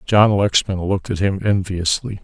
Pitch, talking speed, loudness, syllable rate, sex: 95 Hz, 160 wpm, -18 LUFS, 4.8 syllables/s, male